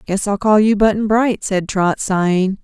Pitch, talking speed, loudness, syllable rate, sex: 200 Hz, 205 wpm, -16 LUFS, 4.4 syllables/s, female